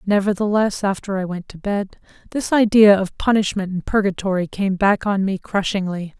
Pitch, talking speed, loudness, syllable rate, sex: 195 Hz, 165 wpm, -19 LUFS, 5.1 syllables/s, female